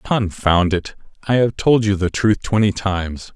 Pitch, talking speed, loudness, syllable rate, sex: 100 Hz, 180 wpm, -18 LUFS, 4.5 syllables/s, male